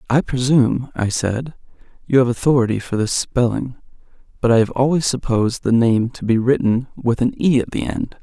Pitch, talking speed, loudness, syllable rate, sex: 125 Hz, 190 wpm, -18 LUFS, 5.3 syllables/s, male